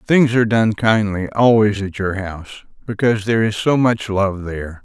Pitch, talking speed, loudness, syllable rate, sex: 105 Hz, 185 wpm, -17 LUFS, 5.2 syllables/s, male